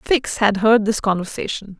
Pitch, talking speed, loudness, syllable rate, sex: 210 Hz, 165 wpm, -18 LUFS, 4.7 syllables/s, female